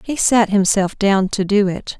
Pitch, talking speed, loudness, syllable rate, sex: 200 Hz, 210 wpm, -16 LUFS, 4.2 syllables/s, female